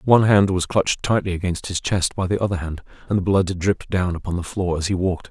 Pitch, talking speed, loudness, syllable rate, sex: 95 Hz, 250 wpm, -21 LUFS, 6.1 syllables/s, male